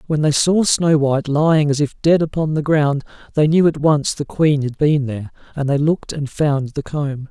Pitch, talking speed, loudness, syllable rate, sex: 150 Hz, 230 wpm, -17 LUFS, 5.0 syllables/s, male